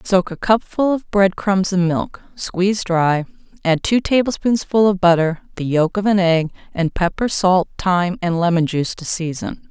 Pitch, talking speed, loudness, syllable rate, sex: 185 Hz, 180 wpm, -18 LUFS, 4.6 syllables/s, female